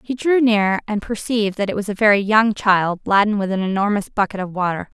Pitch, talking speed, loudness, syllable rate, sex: 205 Hz, 230 wpm, -18 LUFS, 5.8 syllables/s, female